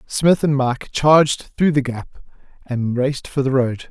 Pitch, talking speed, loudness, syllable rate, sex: 135 Hz, 200 wpm, -18 LUFS, 4.7 syllables/s, male